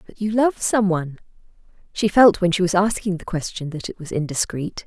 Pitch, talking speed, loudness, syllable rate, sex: 185 Hz, 210 wpm, -20 LUFS, 5.5 syllables/s, female